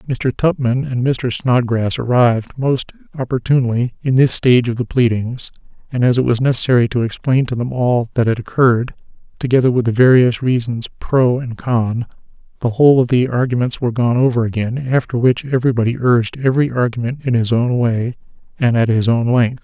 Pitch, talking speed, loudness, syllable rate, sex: 120 Hz, 180 wpm, -16 LUFS, 5.6 syllables/s, male